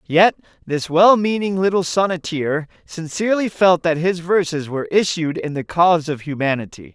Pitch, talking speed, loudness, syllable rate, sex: 170 Hz, 155 wpm, -18 LUFS, 5.0 syllables/s, male